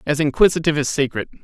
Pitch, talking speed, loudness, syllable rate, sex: 145 Hz, 170 wpm, -18 LUFS, 7.6 syllables/s, male